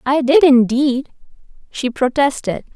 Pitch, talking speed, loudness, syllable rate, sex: 270 Hz, 110 wpm, -15 LUFS, 4.0 syllables/s, female